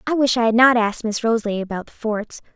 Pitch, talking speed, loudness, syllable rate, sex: 230 Hz, 260 wpm, -19 LUFS, 6.6 syllables/s, female